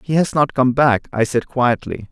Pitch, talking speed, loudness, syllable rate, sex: 130 Hz, 225 wpm, -17 LUFS, 4.6 syllables/s, male